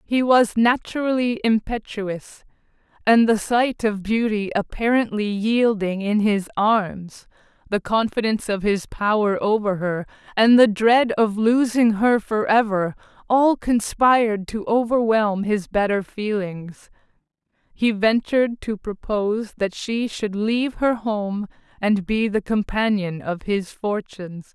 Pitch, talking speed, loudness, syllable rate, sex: 215 Hz, 125 wpm, -21 LUFS, 4.0 syllables/s, female